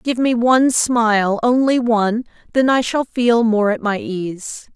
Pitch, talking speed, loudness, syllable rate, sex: 230 Hz, 150 wpm, -17 LUFS, 4.2 syllables/s, female